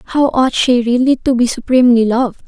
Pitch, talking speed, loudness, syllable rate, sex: 245 Hz, 195 wpm, -13 LUFS, 5.4 syllables/s, female